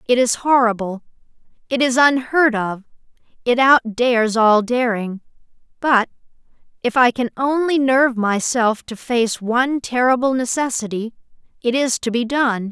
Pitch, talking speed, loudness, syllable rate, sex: 240 Hz, 130 wpm, -18 LUFS, 4.8 syllables/s, female